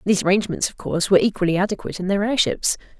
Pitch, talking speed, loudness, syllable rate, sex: 195 Hz, 200 wpm, -20 LUFS, 8.2 syllables/s, female